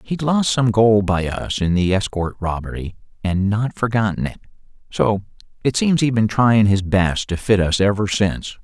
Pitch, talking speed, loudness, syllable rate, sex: 105 Hz, 190 wpm, -19 LUFS, 4.7 syllables/s, male